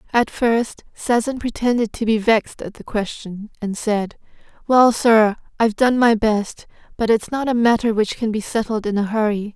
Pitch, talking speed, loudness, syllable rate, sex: 220 Hz, 190 wpm, -19 LUFS, 4.9 syllables/s, female